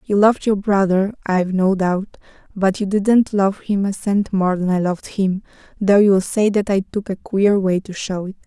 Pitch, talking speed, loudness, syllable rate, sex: 195 Hz, 220 wpm, -18 LUFS, 4.8 syllables/s, female